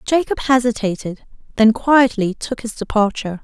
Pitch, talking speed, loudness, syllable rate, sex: 230 Hz, 120 wpm, -17 LUFS, 5.0 syllables/s, female